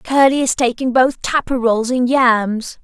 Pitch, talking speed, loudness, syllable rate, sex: 250 Hz, 170 wpm, -15 LUFS, 4.0 syllables/s, female